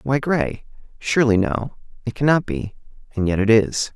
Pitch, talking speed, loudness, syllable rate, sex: 115 Hz, 120 wpm, -20 LUFS, 4.9 syllables/s, male